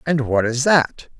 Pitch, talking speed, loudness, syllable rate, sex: 135 Hz, 200 wpm, -18 LUFS, 4.0 syllables/s, male